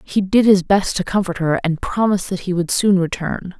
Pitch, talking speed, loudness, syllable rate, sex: 185 Hz, 235 wpm, -18 LUFS, 5.2 syllables/s, female